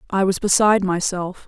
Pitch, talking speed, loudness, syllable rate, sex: 190 Hz, 165 wpm, -19 LUFS, 5.5 syllables/s, female